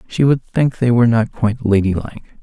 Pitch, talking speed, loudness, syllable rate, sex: 115 Hz, 200 wpm, -16 LUFS, 6.2 syllables/s, male